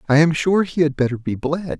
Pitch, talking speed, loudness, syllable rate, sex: 155 Hz, 265 wpm, -19 LUFS, 5.4 syllables/s, male